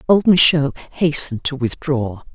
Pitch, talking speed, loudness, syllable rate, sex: 145 Hz, 130 wpm, -17 LUFS, 4.7 syllables/s, female